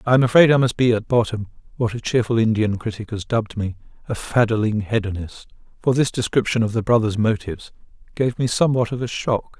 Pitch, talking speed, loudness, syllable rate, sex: 115 Hz, 200 wpm, -20 LUFS, 5.9 syllables/s, male